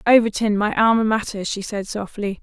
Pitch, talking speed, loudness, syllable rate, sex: 210 Hz, 175 wpm, -20 LUFS, 5.2 syllables/s, female